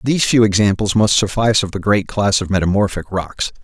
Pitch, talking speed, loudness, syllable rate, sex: 100 Hz, 200 wpm, -16 LUFS, 5.8 syllables/s, male